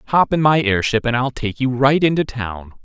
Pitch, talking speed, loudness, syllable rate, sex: 130 Hz, 230 wpm, -18 LUFS, 4.8 syllables/s, male